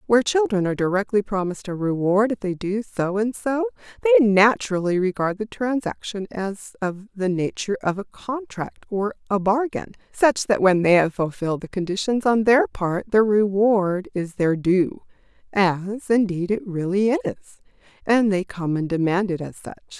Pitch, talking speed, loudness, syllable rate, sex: 200 Hz, 170 wpm, -22 LUFS, 4.9 syllables/s, female